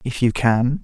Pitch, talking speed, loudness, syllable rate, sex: 120 Hz, 215 wpm, -19 LUFS, 4.1 syllables/s, male